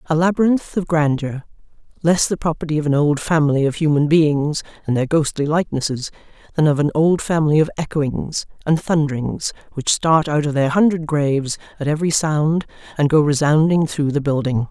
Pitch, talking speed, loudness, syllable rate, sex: 155 Hz, 175 wpm, -18 LUFS, 5.4 syllables/s, female